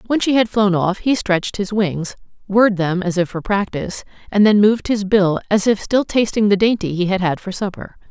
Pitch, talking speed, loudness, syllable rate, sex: 200 Hz, 230 wpm, -17 LUFS, 5.4 syllables/s, female